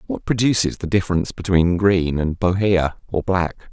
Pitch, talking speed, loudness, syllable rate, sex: 90 Hz, 160 wpm, -19 LUFS, 5.1 syllables/s, male